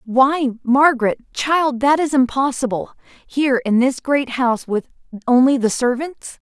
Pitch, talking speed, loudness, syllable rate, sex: 260 Hz, 130 wpm, -18 LUFS, 4.6 syllables/s, female